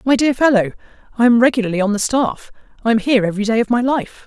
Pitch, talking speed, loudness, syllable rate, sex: 230 Hz, 225 wpm, -16 LUFS, 6.8 syllables/s, female